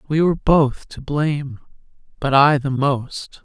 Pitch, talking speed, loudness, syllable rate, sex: 140 Hz, 140 wpm, -18 LUFS, 4.1 syllables/s, female